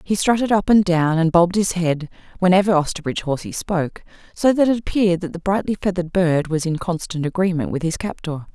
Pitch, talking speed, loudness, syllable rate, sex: 180 Hz, 205 wpm, -19 LUFS, 6.1 syllables/s, female